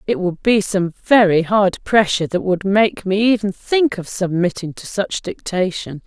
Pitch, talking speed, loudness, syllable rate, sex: 195 Hz, 180 wpm, -17 LUFS, 4.5 syllables/s, female